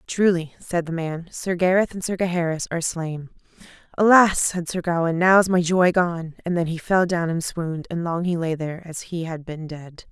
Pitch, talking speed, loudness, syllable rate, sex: 170 Hz, 220 wpm, -22 LUFS, 5.1 syllables/s, female